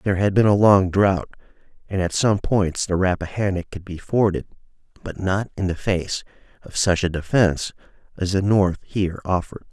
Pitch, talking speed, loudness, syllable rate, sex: 95 Hz, 180 wpm, -21 LUFS, 5.3 syllables/s, male